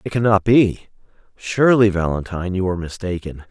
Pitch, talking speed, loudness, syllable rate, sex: 95 Hz, 135 wpm, -18 LUFS, 5.9 syllables/s, male